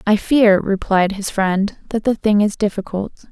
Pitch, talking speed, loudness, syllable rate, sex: 205 Hz, 180 wpm, -17 LUFS, 4.3 syllables/s, female